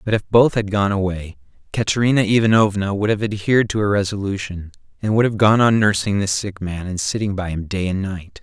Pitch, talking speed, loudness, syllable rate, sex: 100 Hz, 215 wpm, -19 LUFS, 5.7 syllables/s, male